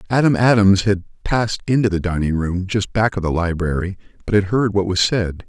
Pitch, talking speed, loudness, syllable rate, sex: 100 Hz, 210 wpm, -18 LUFS, 5.5 syllables/s, male